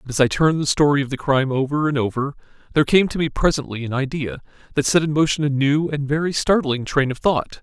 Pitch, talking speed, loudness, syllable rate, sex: 145 Hz, 245 wpm, -20 LUFS, 6.4 syllables/s, male